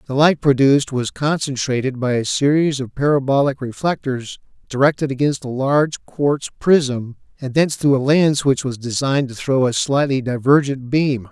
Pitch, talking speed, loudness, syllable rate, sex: 135 Hz, 165 wpm, -18 LUFS, 5.0 syllables/s, male